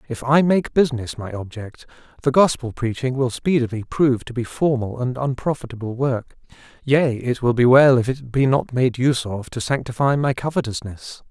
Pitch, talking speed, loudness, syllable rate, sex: 125 Hz, 180 wpm, -20 LUFS, 5.2 syllables/s, male